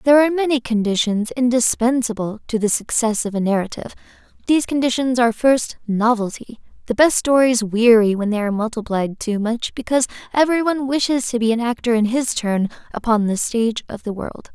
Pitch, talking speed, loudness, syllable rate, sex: 235 Hz, 175 wpm, -19 LUFS, 5.9 syllables/s, female